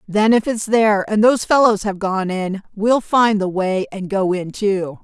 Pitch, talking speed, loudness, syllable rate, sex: 205 Hz, 215 wpm, -17 LUFS, 4.5 syllables/s, female